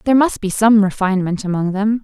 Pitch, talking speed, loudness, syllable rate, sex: 205 Hz, 205 wpm, -16 LUFS, 6.4 syllables/s, female